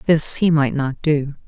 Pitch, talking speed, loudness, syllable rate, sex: 150 Hz, 205 wpm, -18 LUFS, 4.1 syllables/s, female